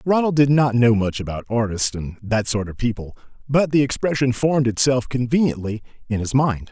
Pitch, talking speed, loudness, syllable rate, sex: 120 Hz, 190 wpm, -20 LUFS, 5.4 syllables/s, male